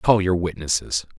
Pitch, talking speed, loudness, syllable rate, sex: 85 Hz, 150 wpm, -22 LUFS, 4.8 syllables/s, male